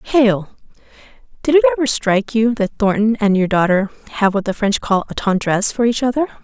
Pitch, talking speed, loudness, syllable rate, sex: 215 Hz, 195 wpm, -16 LUFS, 5.8 syllables/s, female